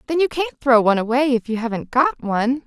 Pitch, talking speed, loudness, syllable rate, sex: 260 Hz, 245 wpm, -19 LUFS, 6.0 syllables/s, female